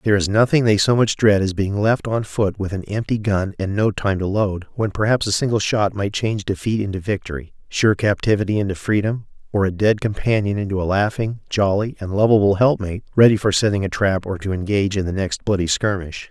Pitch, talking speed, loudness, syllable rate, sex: 100 Hz, 220 wpm, -19 LUFS, 5.7 syllables/s, male